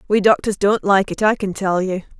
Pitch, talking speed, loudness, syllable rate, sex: 200 Hz, 245 wpm, -18 LUFS, 5.4 syllables/s, female